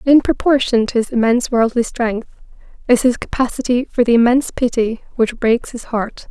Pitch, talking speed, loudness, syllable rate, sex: 240 Hz, 170 wpm, -16 LUFS, 5.2 syllables/s, female